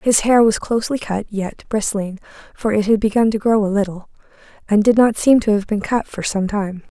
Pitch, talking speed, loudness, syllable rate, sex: 210 Hz, 225 wpm, -18 LUFS, 5.3 syllables/s, female